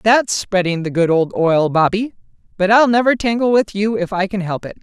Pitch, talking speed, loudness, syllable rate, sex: 200 Hz, 225 wpm, -16 LUFS, 5.1 syllables/s, female